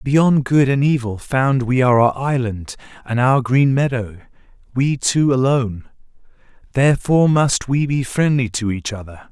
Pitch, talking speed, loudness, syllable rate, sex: 130 Hz, 140 wpm, -17 LUFS, 4.4 syllables/s, male